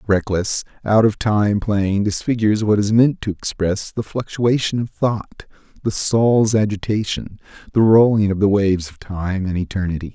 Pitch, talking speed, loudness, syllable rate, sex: 105 Hz, 160 wpm, -18 LUFS, 4.6 syllables/s, male